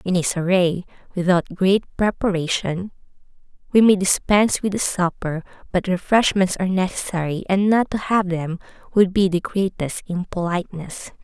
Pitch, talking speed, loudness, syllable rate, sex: 185 Hz, 140 wpm, -20 LUFS, 4.9 syllables/s, female